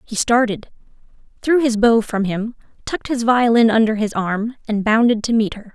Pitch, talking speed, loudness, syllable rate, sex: 225 Hz, 190 wpm, -17 LUFS, 5.0 syllables/s, female